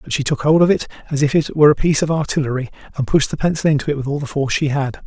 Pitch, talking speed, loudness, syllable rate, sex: 145 Hz, 310 wpm, -17 LUFS, 7.7 syllables/s, male